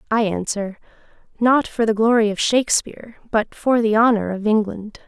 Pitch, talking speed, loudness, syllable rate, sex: 220 Hz, 165 wpm, -19 LUFS, 5.2 syllables/s, female